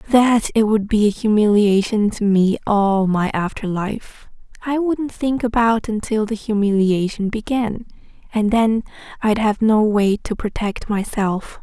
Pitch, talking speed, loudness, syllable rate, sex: 215 Hz, 150 wpm, -18 LUFS, 4.0 syllables/s, female